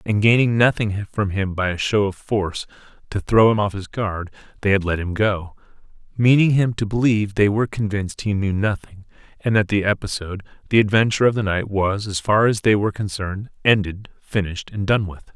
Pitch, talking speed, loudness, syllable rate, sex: 100 Hz, 200 wpm, -20 LUFS, 5.7 syllables/s, male